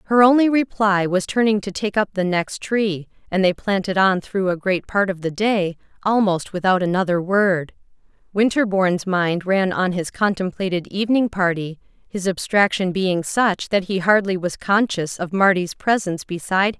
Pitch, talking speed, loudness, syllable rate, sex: 190 Hz, 170 wpm, -20 LUFS, 4.9 syllables/s, female